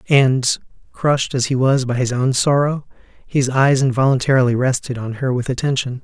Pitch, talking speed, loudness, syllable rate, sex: 130 Hz, 170 wpm, -17 LUFS, 5.3 syllables/s, male